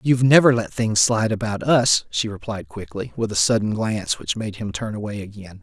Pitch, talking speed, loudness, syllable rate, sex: 110 Hz, 215 wpm, -20 LUFS, 5.5 syllables/s, male